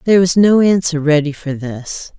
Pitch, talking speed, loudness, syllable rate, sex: 165 Hz, 190 wpm, -14 LUFS, 5.0 syllables/s, female